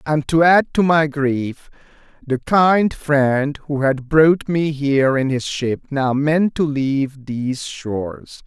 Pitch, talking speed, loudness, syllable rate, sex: 145 Hz, 165 wpm, -18 LUFS, 3.6 syllables/s, male